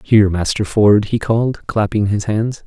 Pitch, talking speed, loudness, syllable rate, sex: 105 Hz, 180 wpm, -16 LUFS, 4.7 syllables/s, male